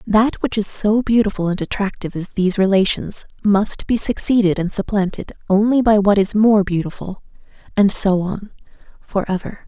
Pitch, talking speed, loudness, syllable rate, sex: 200 Hz, 160 wpm, -18 LUFS, 5.1 syllables/s, female